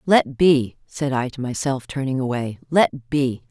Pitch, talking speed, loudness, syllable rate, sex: 135 Hz, 170 wpm, -21 LUFS, 4.1 syllables/s, female